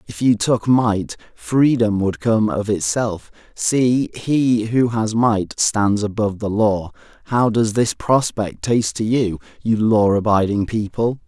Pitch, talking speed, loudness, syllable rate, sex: 110 Hz, 155 wpm, -18 LUFS, 3.8 syllables/s, male